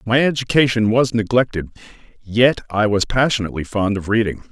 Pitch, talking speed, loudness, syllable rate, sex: 110 Hz, 145 wpm, -18 LUFS, 5.6 syllables/s, male